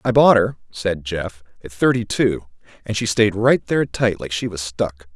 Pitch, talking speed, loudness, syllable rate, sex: 100 Hz, 210 wpm, -19 LUFS, 4.6 syllables/s, male